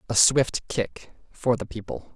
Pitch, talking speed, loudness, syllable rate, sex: 115 Hz, 165 wpm, -24 LUFS, 4.0 syllables/s, male